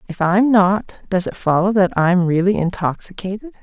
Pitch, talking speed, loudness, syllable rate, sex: 190 Hz, 165 wpm, -17 LUFS, 4.9 syllables/s, female